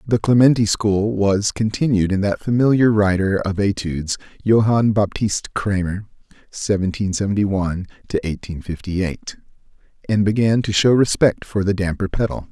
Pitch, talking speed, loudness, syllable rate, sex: 100 Hz, 145 wpm, -19 LUFS, 3.9 syllables/s, male